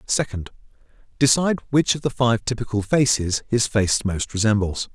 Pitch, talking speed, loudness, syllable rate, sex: 115 Hz, 145 wpm, -21 LUFS, 5.1 syllables/s, male